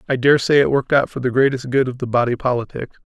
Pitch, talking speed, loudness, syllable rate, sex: 130 Hz, 255 wpm, -18 LUFS, 7.3 syllables/s, male